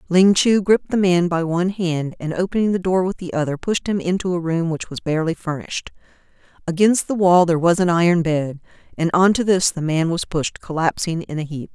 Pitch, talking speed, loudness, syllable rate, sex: 175 Hz, 225 wpm, -19 LUFS, 5.7 syllables/s, female